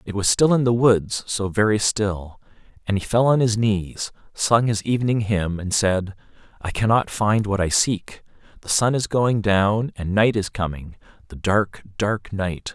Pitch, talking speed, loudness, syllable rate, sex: 105 Hz, 185 wpm, -21 LUFS, 4.2 syllables/s, male